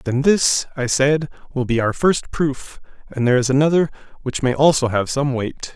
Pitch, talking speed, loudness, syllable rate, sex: 135 Hz, 200 wpm, -19 LUFS, 4.9 syllables/s, male